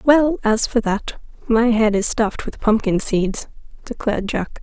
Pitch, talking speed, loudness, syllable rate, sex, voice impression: 220 Hz, 170 wpm, -19 LUFS, 4.5 syllables/s, female, feminine, slightly adult-like, slightly muffled, calm, slightly elegant, slightly kind